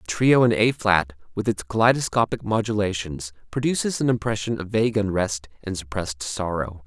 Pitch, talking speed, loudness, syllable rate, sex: 105 Hz, 155 wpm, -23 LUFS, 5.4 syllables/s, male